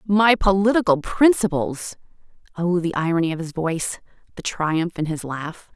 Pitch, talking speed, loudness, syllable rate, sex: 175 Hz, 145 wpm, -21 LUFS, 4.8 syllables/s, female